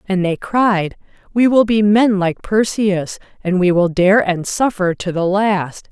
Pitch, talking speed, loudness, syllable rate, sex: 195 Hz, 185 wpm, -16 LUFS, 3.9 syllables/s, female